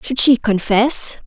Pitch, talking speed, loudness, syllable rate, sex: 230 Hz, 145 wpm, -14 LUFS, 3.6 syllables/s, female